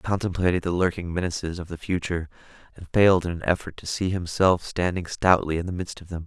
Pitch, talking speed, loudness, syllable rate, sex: 90 Hz, 220 wpm, -24 LUFS, 6.4 syllables/s, male